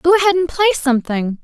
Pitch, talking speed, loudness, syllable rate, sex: 295 Hz, 210 wpm, -16 LUFS, 7.0 syllables/s, female